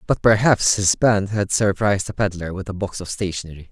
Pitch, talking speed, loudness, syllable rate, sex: 100 Hz, 210 wpm, -20 LUFS, 5.6 syllables/s, male